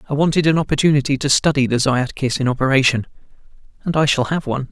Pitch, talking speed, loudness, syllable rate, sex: 140 Hz, 205 wpm, -17 LUFS, 7.0 syllables/s, male